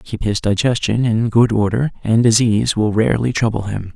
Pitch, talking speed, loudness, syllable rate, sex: 110 Hz, 180 wpm, -16 LUFS, 5.3 syllables/s, male